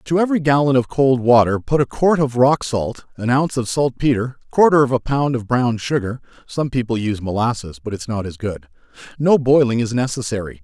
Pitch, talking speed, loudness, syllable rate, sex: 125 Hz, 205 wpm, -18 LUFS, 7.8 syllables/s, male